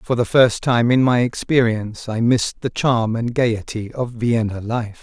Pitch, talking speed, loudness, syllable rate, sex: 115 Hz, 190 wpm, -19 LUFS, 4.5 syllables/s, male